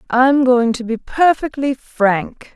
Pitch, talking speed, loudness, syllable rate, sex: 250 Hz, 140 wpm, -16 LUFS, 3.4 syllables/s, female